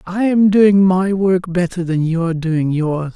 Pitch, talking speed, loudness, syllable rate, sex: 180 Hz, 190 wpm, -15 LUFS, 4.0 syllables/s, male